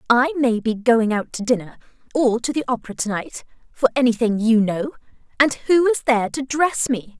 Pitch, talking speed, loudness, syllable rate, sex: 245 Hz, 200 wpm, -20 LUFS, 5.2 syllables/s, female